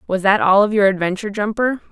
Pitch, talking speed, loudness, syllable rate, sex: 205 Hz, 220 wpm, -16 LUFS, 6.5 syllables/s, female